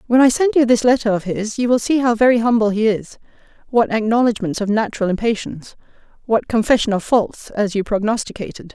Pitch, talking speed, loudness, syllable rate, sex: 225 Hz, 190 wpm, -17 LUFS, 6.1 syllables/s, female